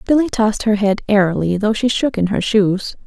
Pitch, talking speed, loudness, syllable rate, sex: 210 Hz, 215 wpm, -16 LUFS, 5.4 syllables/s, female